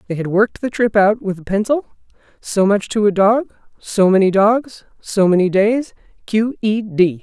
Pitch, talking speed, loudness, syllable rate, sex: 210 Hz, 190 wpm, -16 LUFS, 4.7 syllables/s, female